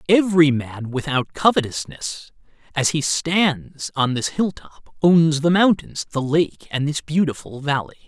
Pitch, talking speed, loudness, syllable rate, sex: 150 Hz, 140 wpm, -20 LUFS, 4.2 syllables/s, male